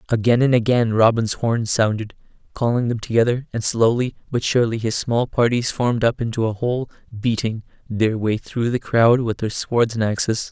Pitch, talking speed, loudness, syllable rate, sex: 115 Hz, 185 wpm, -20 LUFS, 5.2 syllables/s, male